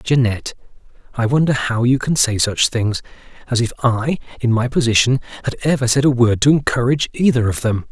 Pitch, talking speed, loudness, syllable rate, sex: 120 Hz, 190 wpm, -17 LUFS, 5.7 syllables/s, male